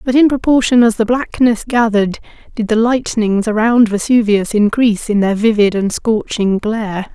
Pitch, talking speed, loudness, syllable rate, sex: 220 Hz, 160 wpm, -14 LUFS, 5.0 syllables/s, female